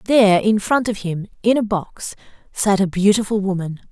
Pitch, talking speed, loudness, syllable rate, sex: 200 Hz, 185 wpm, -18 LUFS, 5.0 syllables/s, female